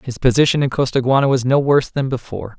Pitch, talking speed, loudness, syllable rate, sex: 130 Hz, 210 wpm, -17 LUFS, 6.8 syllables/s, male